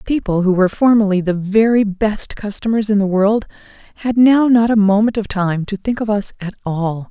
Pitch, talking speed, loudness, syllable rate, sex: 205 Hz, 205 wpm, -16 LUFS, 5.1 syllables/s, female